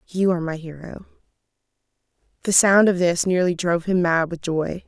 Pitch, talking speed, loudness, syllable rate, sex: 175 Hz, 170 wpm, -20 LUFS, 5.4 syllables/s, female